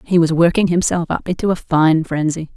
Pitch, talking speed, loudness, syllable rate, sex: 165 Hz, 210 wpm, -16 LUFS, 5.4 syllables/s, female